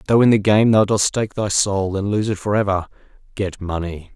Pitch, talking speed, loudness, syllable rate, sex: 100 Hz, 200 wpm, -18 LUFS, 5.4 syllables/s, male